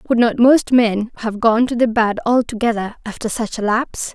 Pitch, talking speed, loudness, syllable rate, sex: 230 Hz, 205 wpm, -17 LUFS, 5.1 syllables/s, female